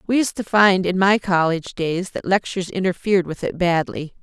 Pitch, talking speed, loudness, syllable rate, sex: 185 Hz, 200 wpm, -20 LUFS, 5.5 syllables/s, female